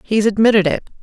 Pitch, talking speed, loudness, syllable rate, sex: 210 Hz, 175 wpm, -15 LUFS, 6.3 syllables/s, female